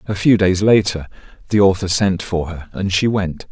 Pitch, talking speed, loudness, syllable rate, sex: 95 Hz, 205 wpm, -17 LUFS, 4.8 syllables/s, male